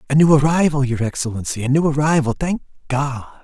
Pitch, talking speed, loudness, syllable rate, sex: 140 Hz, 175 wpm, -18 LUFS, 5.8 syllables/s, male